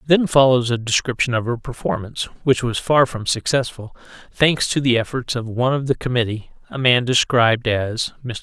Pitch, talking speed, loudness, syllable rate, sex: 125 Hz, 185 wpm, -19 LUFS, 5.3 syllables/s, male